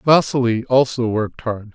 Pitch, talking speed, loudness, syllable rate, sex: 120 Hz, 140 wpm, -18 LUFS, 4.9 syllables/s, male